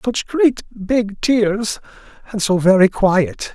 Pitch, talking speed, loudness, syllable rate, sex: 210 Hz, 120 wpm, -16 LUFS, 3.1 syllables/s, male